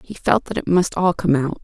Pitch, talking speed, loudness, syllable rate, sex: 170 Hz, 295 wpm, -19 LUFS, 5.2 syllables/s, female